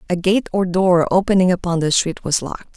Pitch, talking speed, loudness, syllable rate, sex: 175 Hz, 215 wpm, -17 LUFS, 5.6 syllables/s, female